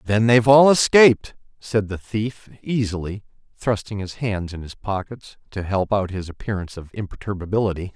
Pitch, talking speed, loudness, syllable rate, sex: 105 Hz, 160 wpm, -20 LUFS, 5.3 syllables/s, male